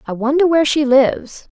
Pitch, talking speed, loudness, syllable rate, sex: 275 Hz, 195 wpm, -14 LUFS, 5.8 syllables/s, female